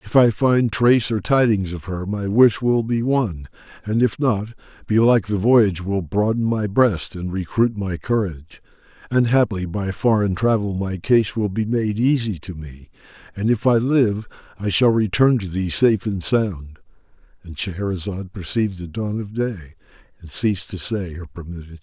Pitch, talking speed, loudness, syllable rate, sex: 100 Hz, 180 wpm, -20 LUFS, 4.8 syllables/s, male